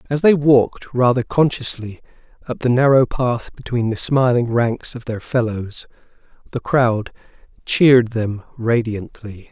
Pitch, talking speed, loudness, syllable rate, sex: 120 Hz, 130 wpm, -18 LUFS, 4.3 syllables/s, male